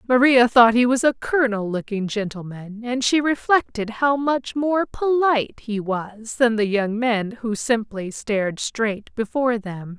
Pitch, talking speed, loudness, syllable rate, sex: 230 Hz, 160 wpm, -21 LUFS, 4.2 syllables/s, female